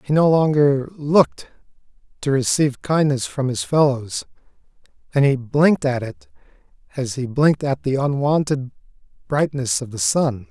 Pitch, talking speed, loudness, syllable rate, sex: 140 Hz, 145 wpm, -19 LUFS, 4.8 syllables/s, male